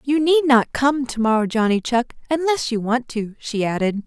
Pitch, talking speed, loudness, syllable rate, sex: 250 Hz, 190 wpm, -20 LUFS, 4.9 syllables/s, female